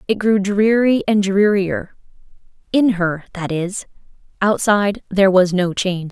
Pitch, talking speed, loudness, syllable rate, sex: 200 Hz, 130 wpm, -17 LUFS, 4.5 syllables/s, female